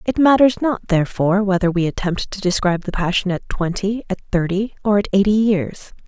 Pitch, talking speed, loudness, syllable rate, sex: 195 Hz, 190 wpm, -18 LUFS, 5.6 syllables/s, female